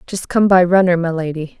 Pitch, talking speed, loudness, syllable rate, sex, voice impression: 175 Hz, 225 wpm, -15 LUFS, 5.4 syllables/s, female, feminine, adult-like, soft, fluent, slightly intellectual, calm, friendly, elegant, kind, slightly modest